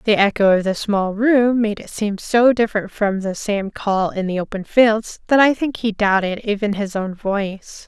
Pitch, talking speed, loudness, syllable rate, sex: 210 Hz, 215 wpm, -18 LUFS, 4.6 syllables/s, female